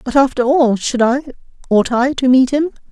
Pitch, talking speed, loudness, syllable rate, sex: 260 Hz, 205 wpm, -14 LUFS, 4.9 syllables/s, female